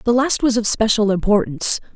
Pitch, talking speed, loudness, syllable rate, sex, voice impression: 220 Hz, 185 wpm, -17 LUFS, 5.9 syllables/s, female, very feminine, slightly young, adult-like, thin, very tensed, very powerful, bright, very hard, very clear, very fluent, cute, slightly intellectual, very refreshing, sincere, calm, friendly, reassuring, very unique, slightly elegant, very wild, slightly sweet, very lively, very strict, very intense, sharp